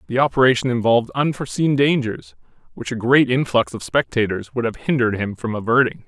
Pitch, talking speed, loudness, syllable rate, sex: 120 Hz, 170 wpm, -19 LUFS, 6.0 syllables/s, male